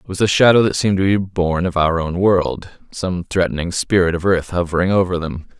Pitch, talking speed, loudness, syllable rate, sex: 90 Hz, 215 wpm, -17 LUFS, 5.5 syllables/s, male